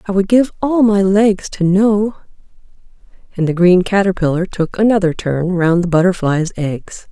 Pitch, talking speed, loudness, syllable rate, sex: 190 Hz, 160 wpm, -14 LUFS, 4.6 syllables/s, female